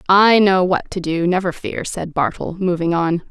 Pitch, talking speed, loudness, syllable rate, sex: 180 Hz, 200 wpm, -17 LUFS, 4.6 syllables/s, female